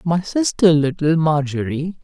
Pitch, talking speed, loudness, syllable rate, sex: 160 Hz, 120 wpm, -18 LUFS, 4.2 syllables/s, male